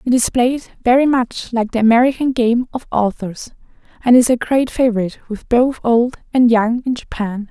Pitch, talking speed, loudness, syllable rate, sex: 240 Hz, 185 wpm, -16 LUFS, 5.1 syllables/s, female